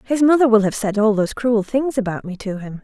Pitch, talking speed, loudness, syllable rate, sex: 220 Hz, 275 wpm, -18 LUFS, 5.9 syllables/s, female